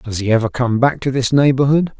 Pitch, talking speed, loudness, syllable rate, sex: 130 Hz, 240 wpm, -16 LUFS, 5.7 syllables/s, male